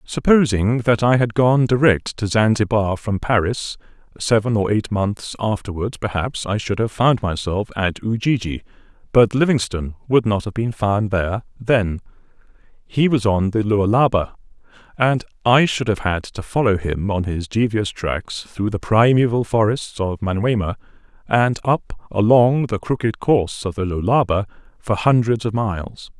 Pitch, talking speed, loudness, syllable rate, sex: 110 Hz, 155 wpm, -19 LUFS, 4.7 syllables/s, male